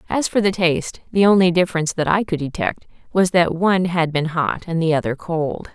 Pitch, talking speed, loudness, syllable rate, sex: 175 Hz, 220 wpm, -19 LUFS, 5.6 syllables/s, female